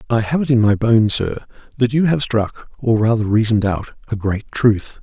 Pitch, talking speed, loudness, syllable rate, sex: 115 Hz, 190 wpm, -17 LUFS, 5.2 syllables/s, male